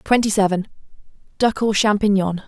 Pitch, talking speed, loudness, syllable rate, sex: 205 Hz, 95 wpm, -18 LUFS, 5.3 syllables/s, female